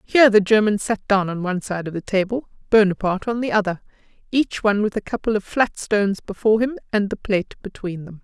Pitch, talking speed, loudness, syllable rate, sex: 205 Hz, 220 wpm, -20 LUFS, 6.2 syllables/s, female